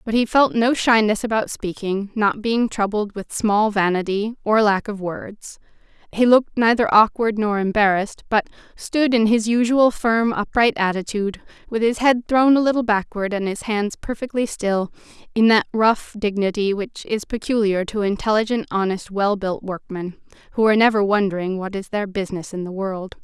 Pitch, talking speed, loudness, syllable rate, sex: 210 Hz, 175 wpm, -20 LUFS, 5.0 syllables/s, female